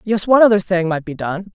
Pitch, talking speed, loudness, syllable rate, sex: 190 Hz, 270 wpm, -16 LUFS, 6.2 syllables/s, female